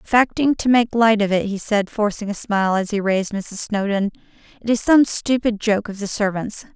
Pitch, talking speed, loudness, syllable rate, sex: 210 Hz, 215 wpm, -19 LUFS, 5.3 syllables/s, female